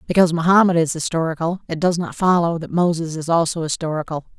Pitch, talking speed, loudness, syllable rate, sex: 165 Hz, 180 wpm, -19 LUFS, 6.4 syllables/s, female